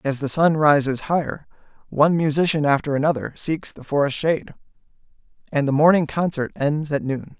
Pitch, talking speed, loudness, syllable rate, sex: 150 Hz, 160 wpm, -20 LUFS, 5.5 syllables/s, male